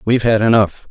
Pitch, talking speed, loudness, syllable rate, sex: 110 Hz, 200 wpm, -14 LUFS, 6.3 syllables/s, male